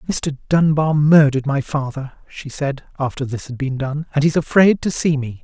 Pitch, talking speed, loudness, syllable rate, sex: 145 Hz, 200 wpm, -18 LUFS, 5.0 syllables/s, male